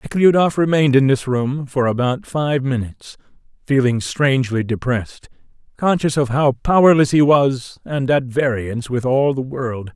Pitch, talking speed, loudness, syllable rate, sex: 135 Hz, 150 wpm, -17 LUFS, 4.8 syllables/s, male